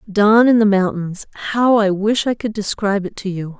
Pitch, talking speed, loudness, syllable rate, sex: 205 Hz, 200 wpm, -16 LUFS, 5.0 syllables/s, female